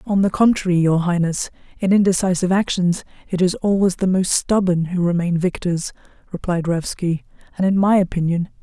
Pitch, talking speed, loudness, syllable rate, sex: 180 Hz, 160 wpm, -19 LUFS, 5.5 syllables/s, female